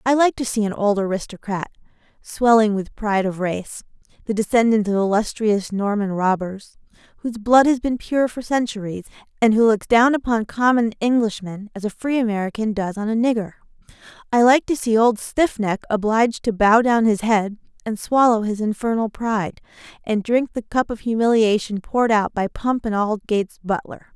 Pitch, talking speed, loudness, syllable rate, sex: 220 Hz, 170 wpm, -20 LUFS, 5.2 syllables/s, female